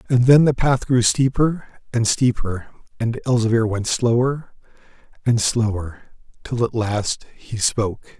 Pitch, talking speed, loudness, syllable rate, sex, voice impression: 115 Hz, 140 wpm, -20 LUFS, 4.0 syllables/s, male, masculine, very adult-like, slightly thick, cool, sincere, slightly elegant